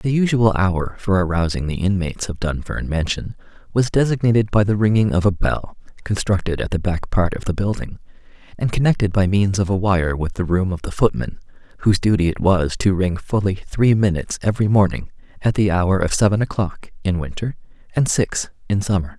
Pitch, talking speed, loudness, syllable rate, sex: 95 Hz, 195 wpm, -20 LUFS, 5.6 syllables/s, male